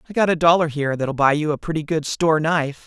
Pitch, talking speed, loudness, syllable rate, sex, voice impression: 155 Hz, 275 wpm, -19 LUFS, 6.7 syllables/s, male, very masculine, gender-neutral, adult-like, slightly thick, tensed, slightly powerful, slightly bright, slightly hard, clear, fluent, cool, intellectual, very refreshing, sincere, very calm, very friendly, very reassuring, unique, elegant, wild, sweet, lively, kind, sharp